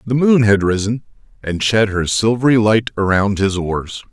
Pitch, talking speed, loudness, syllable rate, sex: 110 Hz, 175 wpm, -16 LUFS, 4.6 syllables/s, male